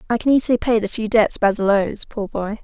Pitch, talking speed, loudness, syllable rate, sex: 215 Hz, 250 wpm, -19 LUFS, 5.8 syllables/s, female